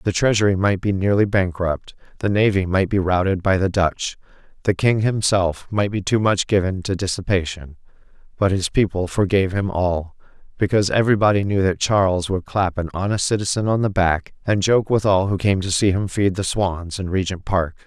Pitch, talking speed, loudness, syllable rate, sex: 95 Hz, 195 wpm, -20 LUFS, 5.3 syllables/s, male